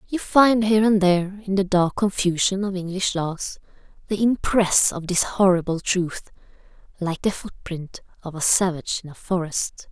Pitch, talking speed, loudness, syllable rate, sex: 185 Hz, 170 wpm, -21 LUFS, 4.9 syllables/s, female